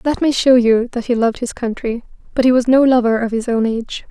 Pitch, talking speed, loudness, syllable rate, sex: 240 Hz, 265 wpm, -16 LUFS, 5.9 syllables/s, female